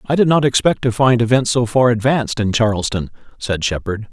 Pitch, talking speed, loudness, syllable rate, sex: 120 Hz, 205 wpm, -16 LUFS, 5.7 syllables/s, male